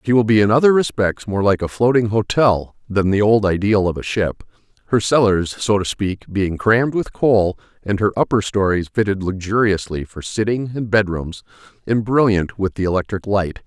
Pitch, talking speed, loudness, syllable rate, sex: 105 Hz, 195 wpm, -18 LUFS, 5.1 syllables/s, male